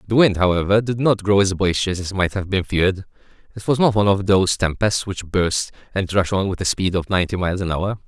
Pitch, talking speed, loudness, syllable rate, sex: 95 Hz, 245 wpm, -19 LUFS, 6.2 syllables/s, male